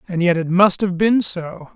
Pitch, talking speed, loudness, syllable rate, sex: 180 Hz, 240 wpm, -17 LUFS, 4.4 syllables/s, male